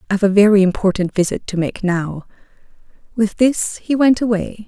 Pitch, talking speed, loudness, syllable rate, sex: 205 Hz, 165 wpm, -16 LUFS, 5.4 syllables/s, female